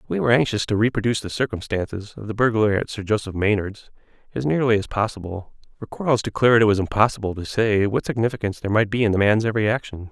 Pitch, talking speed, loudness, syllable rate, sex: 105 Hz, 215 wpm, -21 LUFS, 7.0 syllables/s, male